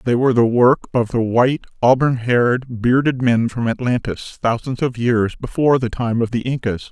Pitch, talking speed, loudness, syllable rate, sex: 120 Hz, 190 wpm, -18 LUFS, 5.1 syllables/s, male